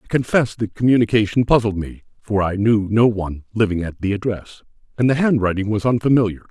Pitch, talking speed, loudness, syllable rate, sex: 110 Hz, 185 wpm, -18 LUFS, 5.9 syllables/s, male